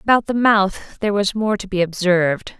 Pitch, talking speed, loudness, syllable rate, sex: 200 Hz, 210 wpm, -18 LUFS, 5.1 syllables/s, female